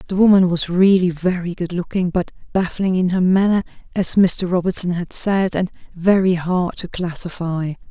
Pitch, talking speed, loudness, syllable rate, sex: 180 Hz, 165 wpm, -18 LUFS, 4.8 syllables/s, female